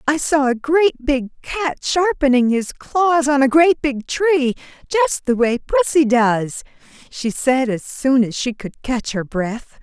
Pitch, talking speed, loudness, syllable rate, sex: 260 Hz, 175 wpm, -18 LUFS, 3.7 syllables/s, female